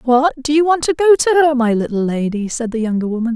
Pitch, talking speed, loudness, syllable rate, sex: 260 Hz, 270 wpm, -15 LUFS, 6.0 syllables/s, female